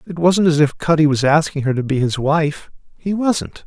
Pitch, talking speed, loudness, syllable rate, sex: 155 Hz, 230 wpm, -17 LUFS, 4.9 syllables/s, male